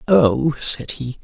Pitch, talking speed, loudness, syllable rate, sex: 135 Hz, 145 wpm, -19 LUFS, 2.8 syllables/s, male